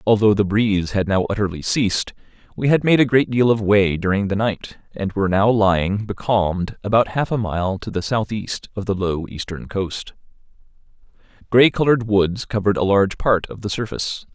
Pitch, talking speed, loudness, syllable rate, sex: 105 Hz, 190 wpm, -19 LUFS, 5.4 syllables/s, male